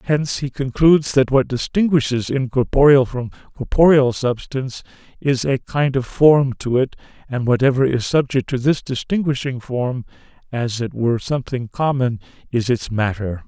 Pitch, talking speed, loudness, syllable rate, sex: 130 Hz, 145 wpm, -18 LUFS, 4.9 syllables/s, male